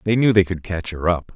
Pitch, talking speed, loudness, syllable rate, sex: 95 Hz, 310 wpm, -20 LUFS, 5.7 syllables/s, male